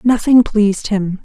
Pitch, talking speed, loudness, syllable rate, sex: 210 Hz, 145 wpm, -14 LUFS, 4.4 syllables/s, female